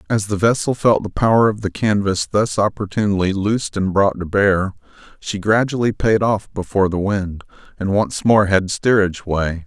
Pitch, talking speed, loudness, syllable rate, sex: 100 Hz, 180 wpm, -18 LUFS, 5.0 syllables/s, male